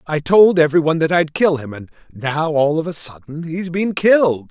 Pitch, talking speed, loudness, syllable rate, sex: 160 Hz, 225 wpm, -16 LUFS, 5.3 syllables/s, male